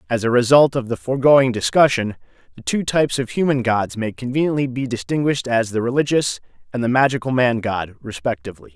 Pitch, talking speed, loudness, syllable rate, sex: 120 Hz, 180 wpm, -19 LUFS, 6.0 syllables/s, male